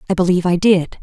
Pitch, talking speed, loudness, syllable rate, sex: 180 Hz, 235 wpm, -15 LUFS, 7.4 syllables/s, female